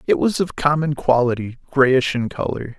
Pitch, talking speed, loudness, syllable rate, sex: 135 Hz, 170 wpm, -19 LUFS, 4.8 syllables/s, male